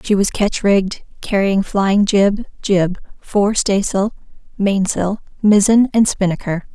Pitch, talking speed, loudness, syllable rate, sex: 200 Hz, 135 wpm, -16 LUFS, 3.9 syllables/s, female